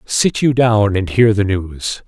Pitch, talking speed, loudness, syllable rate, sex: 105 Hz, 205 wpm, -15 LUFS, 3.6 syllables/s, male